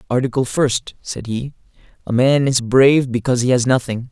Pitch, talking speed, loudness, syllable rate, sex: 125 Hz, 175 wpm, -17 LUFS, 5.4 syllables/s, male